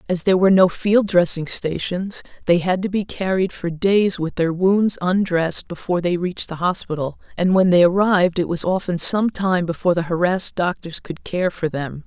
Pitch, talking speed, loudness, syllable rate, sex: 180 Hz, 200 wpm, -19 LUFS, 5.2 syllables/s, female